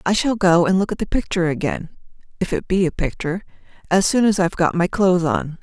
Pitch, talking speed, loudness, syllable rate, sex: 185 Hz, 215 wpm, -19 LUFS, 6.4 syllables/s, female